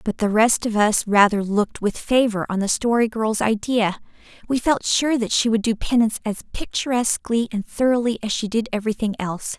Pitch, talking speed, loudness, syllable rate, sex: 220 Hz, 195 wpm, -21 LUFS, 5.5 syllables/s, female